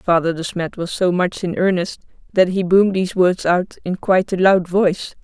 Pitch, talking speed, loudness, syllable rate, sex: 180 Hz, 220 wpm, -18 LUFS, 5.3 syllables/s, female